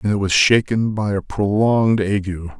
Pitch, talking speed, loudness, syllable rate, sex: 105 Hz, 185 wpm, -18 LUFS, 4.7 syllables/s, male